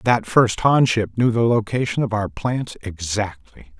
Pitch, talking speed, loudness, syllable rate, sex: 110 Hz, 175 wpm, -20 LUFS, 4.2 syllables/s, male